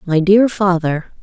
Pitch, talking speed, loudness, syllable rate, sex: 185 Hz, 145 wpm, -14 LUFS, 3.9 syllables/s, female